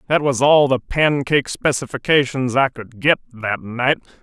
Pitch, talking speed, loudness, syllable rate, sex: 130 Hz, 155 wpm, -18 LUFS, 4.6 syllables/s, male